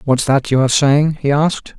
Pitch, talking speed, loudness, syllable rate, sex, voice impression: 140 Hz, 235 wpm, -14 LUFS, 5.6 syllables/s, male, masculine, adult-like, fluent, slightly refreshing, friendly, slightly kind